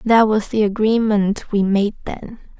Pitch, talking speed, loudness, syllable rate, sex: 210 Hz, 160 wpm, -17 LUFS, 4.1 syllables/s, female